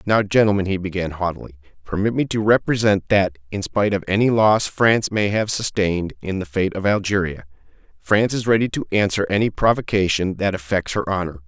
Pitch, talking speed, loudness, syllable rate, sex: 100 Hz, 185 wpm, -20 LUFS, 5.7 syllables/s, male